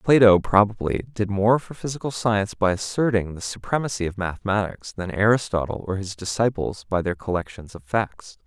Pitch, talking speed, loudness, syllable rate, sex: 105 Hz, 165 wpm, -23 LUFS, 5.4 syllables/s, male